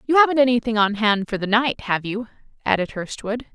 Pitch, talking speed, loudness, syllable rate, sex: 225 Hz, 205 wpm, -21 LUFS, 5.8 syllables/s, female